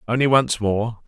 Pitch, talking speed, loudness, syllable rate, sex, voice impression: 115 Hz, 170 wpm, -19 LUFS, 4.5 syllables/s, male, masculine, adult-like, tensed, powerful, clear, cool, intellectual, calm, friendly, wild, lively, slightly kind